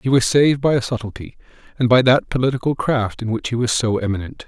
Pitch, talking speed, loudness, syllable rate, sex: 120 Hz, 230 wpm, -18 LUFS, 6.2 syllables/s, male